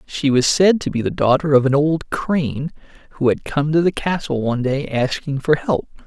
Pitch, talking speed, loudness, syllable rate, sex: 145 Hz, 220 wpm, -18 LUFS, 5.1 syllables/s, male